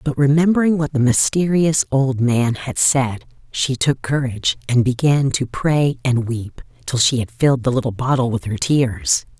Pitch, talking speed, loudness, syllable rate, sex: 130 Hz, 180 wpm, -18 LUFS, 4.6 syllables/s, female